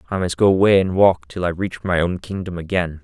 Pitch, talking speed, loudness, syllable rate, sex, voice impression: 90 Hz, 255 wpm, -19 LUFS, 5.7 syllables/s, male, masculine, adult-like, tensed, slightly bright, hard, fluent, cool, intellectual, sincere, calm, reassuring, wild, lively, kind, slightly modest